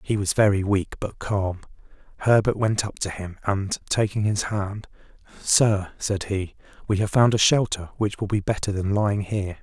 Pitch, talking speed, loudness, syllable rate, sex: 100 Hz, 185 wpm, -23 LUFS, 4.8 syllables/s, male